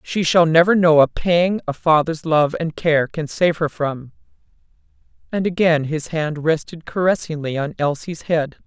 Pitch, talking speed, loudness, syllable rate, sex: 160 Hz, 165 wpm, -18 LUFS, 4.6 syllables/s, female